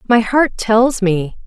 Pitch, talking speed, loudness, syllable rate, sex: 220 Hz, 165 wpm, -15 LUFS, 3.5 syllables/s, female